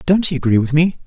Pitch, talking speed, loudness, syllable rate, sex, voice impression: 155 Hz, 280 wpm, -16 LUFS, 6.7 syllables/s, male, very masculine, slightly old, very thick, relaxed, powerful, dark, very soft, very muffled, halting, very raspy, very cool, intellectual, sincere, very calm, very mature, very friendly, reassuring, very unique, slightly elegant, very wild, sweet, lively, kind, modest